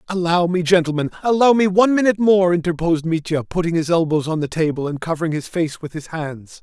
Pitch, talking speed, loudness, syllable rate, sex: 170 Hz, 210 wpm, -18 LUFS, 6.2 syllables/s, male